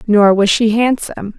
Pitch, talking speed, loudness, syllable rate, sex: 215 Hz, 175 wpm, -13 LUFS, 4.9 syllables/s, female